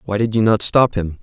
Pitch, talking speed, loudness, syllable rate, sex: 105 Hz, 295 wpm, -16 LUFS, 5.5 syllables/s, male